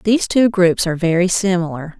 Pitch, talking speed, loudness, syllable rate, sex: 185 Hz, 180 wpm, -16 LUFS, 5.9 syllables/s, female